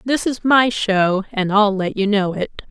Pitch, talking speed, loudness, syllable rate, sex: 210 Hz, 220 wpm, -17 LUFS, 4.1 syllables/s, female